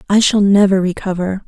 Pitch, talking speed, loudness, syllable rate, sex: 195 Hz, 165 wpm, -14 LUFS, 5.5 syllables/s, female